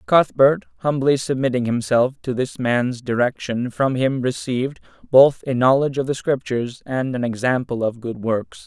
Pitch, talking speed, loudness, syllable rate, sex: 130 Hz, 160 wpm, -20 LUFS, 4.8 syllables/s, male